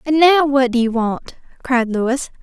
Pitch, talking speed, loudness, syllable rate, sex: 260 Hz, 200 wpm, -16 LUFS, 4.1 syllables/s, female